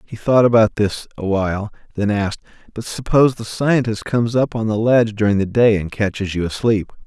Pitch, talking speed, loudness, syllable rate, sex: 110 Hz, 205 wpm, -18 LUFS, 5.7 syllables/s, male